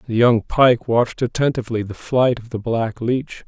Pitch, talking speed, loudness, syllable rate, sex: 120 Hz, 190 wpm, -19 LUFS, 4.9 syllables/s, male